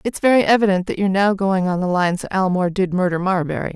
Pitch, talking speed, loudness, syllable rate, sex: 190 Hz, 240 wpm, -18 LUFS, 6.9 syllables/s, female